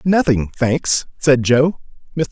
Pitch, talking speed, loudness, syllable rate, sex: 140 Hz, 130 wpm, -16 LUFS, 3.8 syllables/s, male